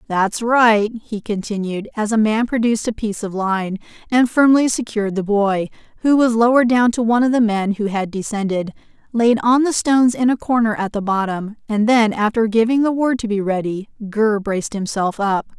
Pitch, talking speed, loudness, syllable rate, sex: 220 Hz, 200 wpm, -18 LUFS, 5.3 syllables/s, female